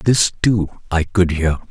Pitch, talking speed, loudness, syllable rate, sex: 90 Hz, 175 wpm, -18 LUFS, 3.5 syllables/s, male